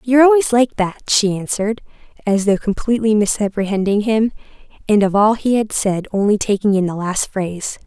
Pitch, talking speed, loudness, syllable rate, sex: 210 Hz, 175 wpm, -17 LUFS, 5.6 syllables/s, female